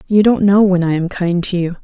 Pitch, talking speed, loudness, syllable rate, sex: 185 Hz, 295 wpm, -14 LUFS, 5.6 syllables/s, female